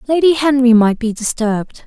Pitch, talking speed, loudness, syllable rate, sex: 250 Hz, 160 wpm, -14 LUFS, 5.3 syllables/s, female